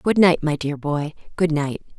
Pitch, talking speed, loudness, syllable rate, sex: 155 Hz, 210 wpm, -21 LUFS, 4.4 syllables/s, female